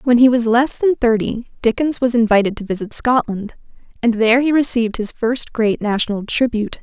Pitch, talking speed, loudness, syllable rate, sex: 235 Hz, 185 wpm, -17 LUFS, 5.5 syllables/s, female